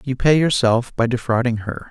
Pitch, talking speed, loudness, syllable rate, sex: 125 Hz, 190 wpm, -18 LUFS, 5.0 syllables/s, male